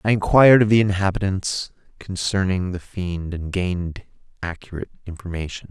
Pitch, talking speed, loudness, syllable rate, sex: 95 Hz, 125 wpm, -21 LUFS, 5.4 syllables/s, male